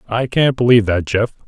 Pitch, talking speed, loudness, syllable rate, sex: 115 Hz, 205 wpm, -15 LUFS, 6.0 syllables/s, male